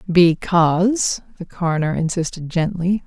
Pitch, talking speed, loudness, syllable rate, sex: 175 Hz, 100 wpm, -19 LUFS, 4.4 syllables/s, female